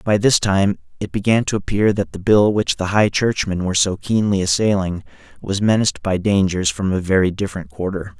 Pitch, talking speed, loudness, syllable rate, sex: 100 Hz, 205 wpm, -18 LUFS, 5.6 syllables/s, male